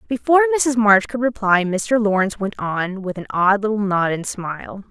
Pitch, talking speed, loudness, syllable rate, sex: 210 Hz, 195 wpm, -18 LUFS, 5.2 syllables/s, female